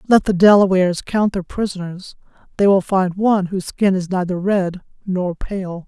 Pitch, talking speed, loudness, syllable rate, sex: 190 Hz, 175 wpm, -18 LUFS, 4.9 syllables/s, female